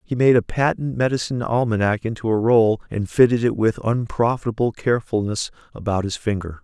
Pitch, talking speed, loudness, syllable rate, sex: 115 Hz, 165 wpm, -20 LUFS, 5.7 syllables/s, male